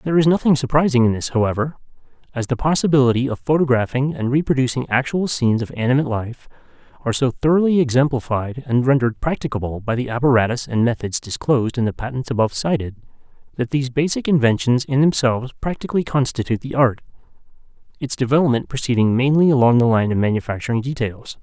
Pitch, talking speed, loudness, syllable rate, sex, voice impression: 130 Hz, 155 wpm, -19 LUFS, 6.6 syllables/s, male, masculine, adult-like, relaxed, slightly dark, fluent, slightly raspy, cool, intellectual, calm, slightly reassuring, wild, slightly modest